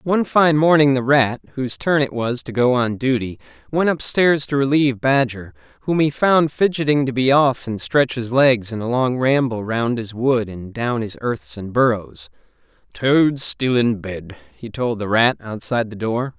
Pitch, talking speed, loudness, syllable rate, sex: 125 Hz, 195 wpm, -18 LUFS, 4.6 syllables/s, male